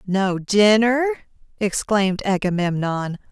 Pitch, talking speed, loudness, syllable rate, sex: 200 Hz, 70 wpm, -20 LUFS, 4.0 syllables/s, female